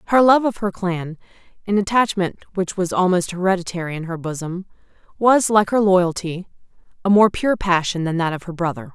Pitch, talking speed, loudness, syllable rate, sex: 190 Hz, 180 wpm, -19 LUFS, 5.4 syllables/s, female